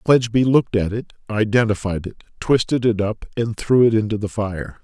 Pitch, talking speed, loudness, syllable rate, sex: 110 Hz, 185 wpm, -19 LUFS, 5.5 syllables/s, male